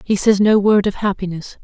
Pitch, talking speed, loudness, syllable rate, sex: 200 Hz, 220 wpm, -16 LUFS, 5.3 syllables/s, female